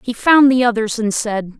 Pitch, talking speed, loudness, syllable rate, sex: 230 Hz, 225 wpm, -15 LUFS, 4.7 syllables/s, female